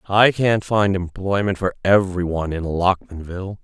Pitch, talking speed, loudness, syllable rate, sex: 95 Hz, 130 wpm, -20 LUFS, 4.8 syllables/s, male